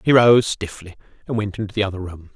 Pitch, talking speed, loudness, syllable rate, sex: 100 Hz, 230 wpm, -20 LUFS, 6.3 syllables/s, male